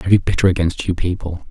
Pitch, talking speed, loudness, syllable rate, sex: 90 Hz, 240 wpm, -18 LUFS, 6.9 syllables/s, male